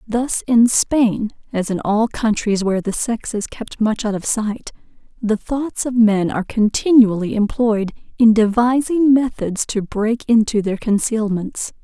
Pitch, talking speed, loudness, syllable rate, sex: 220 Hz, 155 wpm, -18 LUFS, 4.2 syllables/s, female